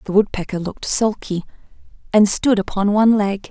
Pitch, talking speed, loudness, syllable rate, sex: 205 Hz, 155 wpm, -18 LUFS, 5.6 syllables/s, female